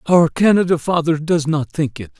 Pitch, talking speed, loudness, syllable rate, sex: 160 Hz, 190 wpm, -17 LUFS, 5.0 syllables/s, male